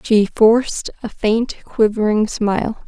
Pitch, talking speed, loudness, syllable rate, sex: 220 Hz, 125 wpm, -17 LUFS, 4.1 syllables/s, female